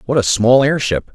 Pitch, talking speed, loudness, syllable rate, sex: 125 Hz, 210 wpm, -14 LUFS, 5.0 syllables/s, male